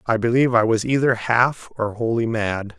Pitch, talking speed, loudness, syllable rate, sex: 115 Hz, 195 wpm, -20 LUFS, 5.0 syllables/s, male